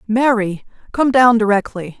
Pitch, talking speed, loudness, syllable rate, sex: 225 Hz, 120 wpm, -15 LUFS, 4.5 syllables/s, female